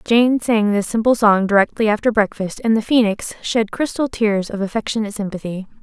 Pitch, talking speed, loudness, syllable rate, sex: 215 Hz, 175 wpm, -18 LUFS, 5.4 syllables/s, female